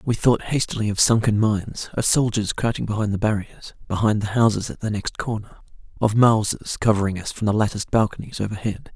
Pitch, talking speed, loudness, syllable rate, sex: 110 Hz, 190 wpm, -22 LUFS, 5.8 syllables/s, male